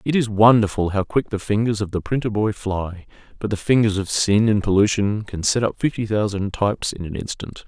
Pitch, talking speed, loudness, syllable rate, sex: 105 Hz, 220 wpm, -20 LUFS, 5.4 syllables/s, male